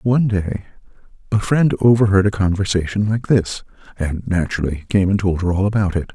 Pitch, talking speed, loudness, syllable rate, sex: 95 Hz, 165 wpm, -18 LUFS, 5.7 syllables/s, male